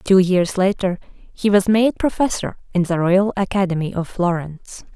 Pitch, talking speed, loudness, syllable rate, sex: 190 Hz, 155 wpm, -19 LUFS, 4.7 syllables/s, female